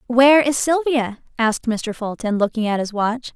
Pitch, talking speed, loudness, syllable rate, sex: 240 Hz, 180 wpm, -19 LUFS, 5.0 syllables/s, female